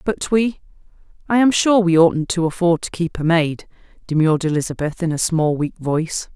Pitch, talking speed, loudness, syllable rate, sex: 170 Hz, 180 wpm, -18 LUFS, 5.2 syllables/s, female